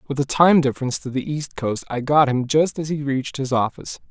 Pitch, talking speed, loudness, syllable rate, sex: 140 Hz, 250 wpm, -20 LUFS, 6.0 syllables/s, male